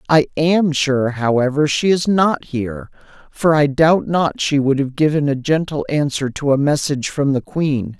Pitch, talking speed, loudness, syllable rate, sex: 145 Hz, 190 wpm, -17 LUFS, 4.5 syllables/s, male